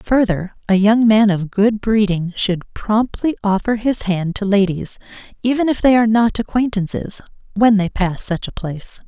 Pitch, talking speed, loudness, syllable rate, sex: 210 Hz, 165 wpm, -17 LUFS, 4.7 syllables/s, female